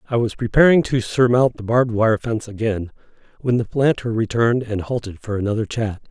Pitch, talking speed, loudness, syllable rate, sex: 115 Hz, 185 wpm, -19 LUFS, 5.8 syllables/s, male